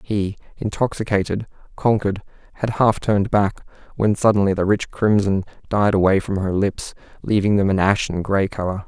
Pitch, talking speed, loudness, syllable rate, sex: 100 Hz, 155 wpm, -20 LUFS, 5.3 syllables/s, male